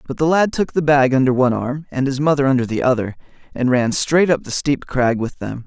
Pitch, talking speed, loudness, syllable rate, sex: 135 Hz, 255 wpm, -18 LUFS, 5.7 syllables/s, male